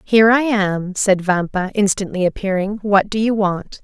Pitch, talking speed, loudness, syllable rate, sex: 200 Hz, 170 wpm, -17 LUFS, 4.6 syllables/s, female